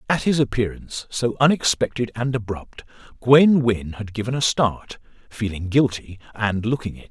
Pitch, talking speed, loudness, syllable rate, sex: 115 Hz, 145 wpm, -21 LUFS, 4.8 syllables/s, male